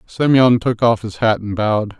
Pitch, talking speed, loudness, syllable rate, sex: 115 Hz, 210 wpm, -16 LUFS, 4.8 syllables/s, male